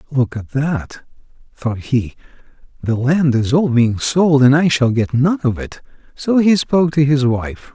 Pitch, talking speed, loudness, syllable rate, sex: 135 Hz, 185 wpm, -16 LUFS, 4.1 syllables/s, male